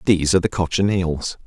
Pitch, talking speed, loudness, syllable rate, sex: 90 Hz, 165 wpm, -20 LUFS, 6.4 syllables/s, male